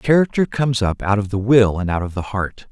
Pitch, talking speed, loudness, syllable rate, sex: 110 Hz, 265 wpm, -18 LUFS, 5.6 syllables/s, male